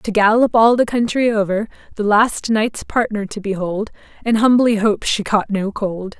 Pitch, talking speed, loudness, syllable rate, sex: 215 Hz, 185 wpm, -17 LUFS, 4.6 syllables/s, female